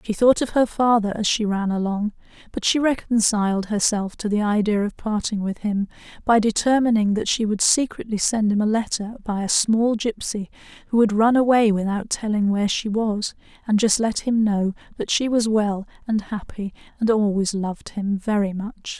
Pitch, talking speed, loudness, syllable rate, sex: 215 Hz, 190 wpm, -21 LUFS, 5.0 syllables/s, female